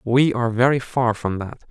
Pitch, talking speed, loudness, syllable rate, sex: 120 Hz, 210 wpm, -20 LUFS, 5.1 syllables/s, male